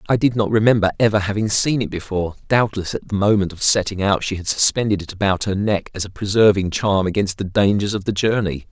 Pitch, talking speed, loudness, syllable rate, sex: 100 Hz, 225 wpm, -19 LUFS, 6.0 syllables/s, male